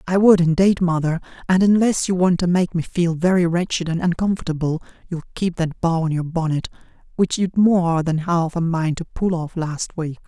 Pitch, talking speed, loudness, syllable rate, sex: 170 Hz, 205 wpm, -20 LUFS, 5.0 syllables/s, male